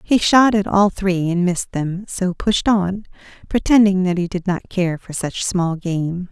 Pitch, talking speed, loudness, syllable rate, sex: 185 Hz, 200 wpm, -18 LUFS, 4.2 syllables/s, female